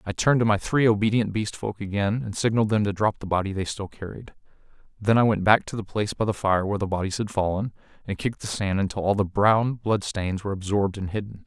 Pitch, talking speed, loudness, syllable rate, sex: 105 Hz, 250 wpm, -24 LUFS, 6.4 syllables/s, male